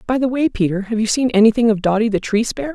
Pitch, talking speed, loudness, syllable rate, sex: 225 Hz, 285 wpm, -17 LUFS, 6.9 syllables/s, female